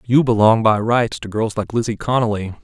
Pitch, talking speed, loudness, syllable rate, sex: 110 Hz, 205 wpm, -17 LUFS, 5.2 syllables/s, male